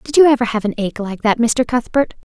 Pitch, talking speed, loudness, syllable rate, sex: 240 Hz, 250 wpm, -17 LUFS, 5.7 syllables/s, female